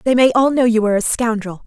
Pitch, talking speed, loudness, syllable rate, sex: 230 Hz, 290 wpm, -15 LUFS, 6.5 syllables/s, female